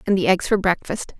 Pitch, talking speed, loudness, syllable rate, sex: 185 Hz, 250 wpm, -20 LUFS, 5.8 syllables/s, female